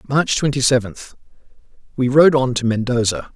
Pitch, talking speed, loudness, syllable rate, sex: 130 Hz, 125 wpm, -17 LUFS, 5.1 syllables/s, male